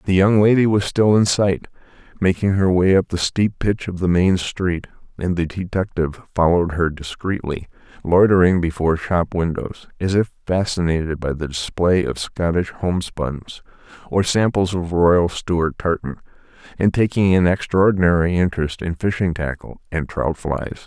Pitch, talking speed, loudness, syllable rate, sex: 90 Hz, 155 wpm, -19 LUFS, 4.9 syllables/s, male